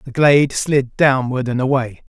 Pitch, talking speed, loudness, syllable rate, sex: 135 Hz, 165 wpm, -16 LUFS, 4.6 syllables/s, male